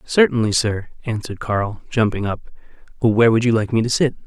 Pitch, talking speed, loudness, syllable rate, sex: 115 Hz, 185 wpm, -19 LUFS, 5.7 syllables/s, male